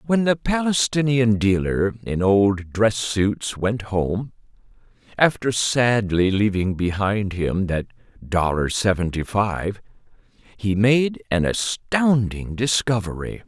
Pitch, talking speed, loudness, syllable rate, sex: 105 Hz, 100 wpm, -21 LUFS, 3.7 syllables/s, male